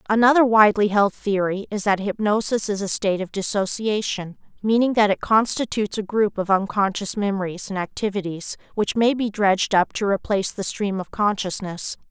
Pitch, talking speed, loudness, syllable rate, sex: 205 Hz, 170 wpm, -21 LUFS, 5.4 syllables/s, female